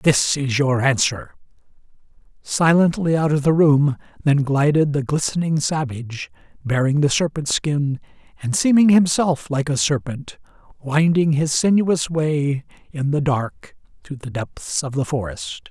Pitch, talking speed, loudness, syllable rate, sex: 145 Hz, 140 wpm, -19 LUFS, 4.2 syllables/s, male